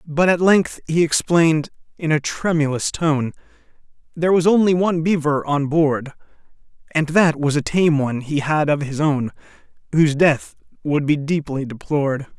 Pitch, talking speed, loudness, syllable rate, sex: 155 Hz, 160 wpm, -19 LUFS, 4.9 syllables/s, male